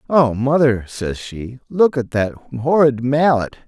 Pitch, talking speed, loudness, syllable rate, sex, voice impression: 130 Hz, 145 wpm, -17 LUFS, 3.7 syllables/s, male, very masculine, very adult-like, very middle-aged, thick, slightly relaxed, slightly powerful, weak, soft, clear, slightly muffled, slightly fluent, cool, intellectual, slightly refreshing, sincere, calm, very mature, friendly, reassuring, unique, slightly elegant, wild, sweet, lively, very kind, intense, slightly modest, slightly light